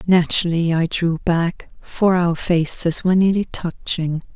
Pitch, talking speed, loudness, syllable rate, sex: 170 Hz, 140 wpm, -19 LUFS, 4.3 syllables/s, female